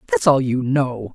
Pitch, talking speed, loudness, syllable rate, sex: 130 Hz, 210 wpm, -19 LUFS, 4.4 syllables/s, female